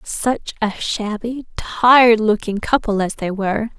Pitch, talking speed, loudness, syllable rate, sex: 220 Hz, 145 wpm, -17 LUFS, 4.1 syllables/s, female